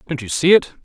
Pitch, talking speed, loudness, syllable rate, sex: 150 Hz, 285 wpm, -16 LUFS, 6.6 syllables/s, male